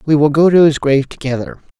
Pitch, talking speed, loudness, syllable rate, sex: 145 Hz, 235 wpm, -13 LUFS, 6.5 syllables/s, male